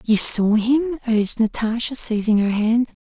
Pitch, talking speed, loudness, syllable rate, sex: 230 Hz, 160 wpm, -19 LUFS, 4.4 syllables/s, female